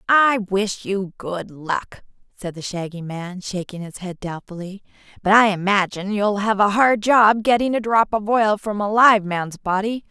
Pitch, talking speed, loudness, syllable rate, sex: 200 Hz, 185 wpm, -19 LUFS, 4.4 syllables/s, female